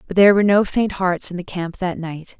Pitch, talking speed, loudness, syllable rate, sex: 185 Hz, 275 wpm, -18 LUFS, 5.8 syllables/s, female